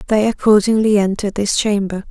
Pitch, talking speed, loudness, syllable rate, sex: 205 Hz, 145 wpm, -15 LUFS, 5.8 syllables/s, female